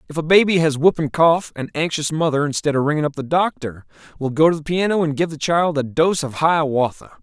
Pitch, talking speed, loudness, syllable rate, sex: 155 Hz, 230 wpm, -18 LUFS, 5.8 syllables/s, male